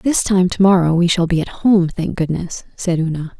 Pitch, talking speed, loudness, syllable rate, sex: 175 Hz, 210 wpm, -16 LUFS, 5.0 syllables/s, female